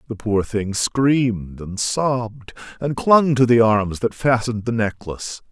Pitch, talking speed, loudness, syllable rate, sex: 115 Hz, 165 wpm, -19 LUFS, 4.2 syllables/s, male